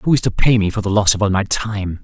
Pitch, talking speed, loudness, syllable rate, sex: 105 Hz, 355 wpm, -17 LUFS, 6.0 syllables/s, male